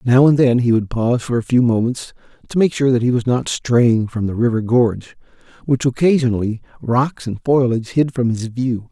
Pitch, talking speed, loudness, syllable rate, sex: 120 Hz, 210 wpm, -17 LUFS, 5.3 syllables/s, male